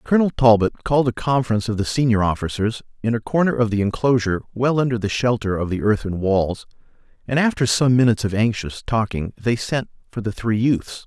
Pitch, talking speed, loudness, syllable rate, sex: 115 Hz, 195 wpm, -20 LUFS, 5.9 syllables/s, male